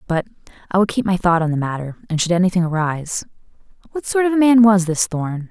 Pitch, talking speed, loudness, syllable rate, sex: 185 Hz, 205 wpm, -18 LUFS, 6.5 syllables/s, female